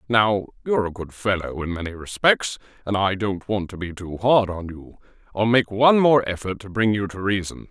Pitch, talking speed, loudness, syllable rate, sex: 100 Hz, 220 wpm, -22 LUFS, 5.3 syllables/s, male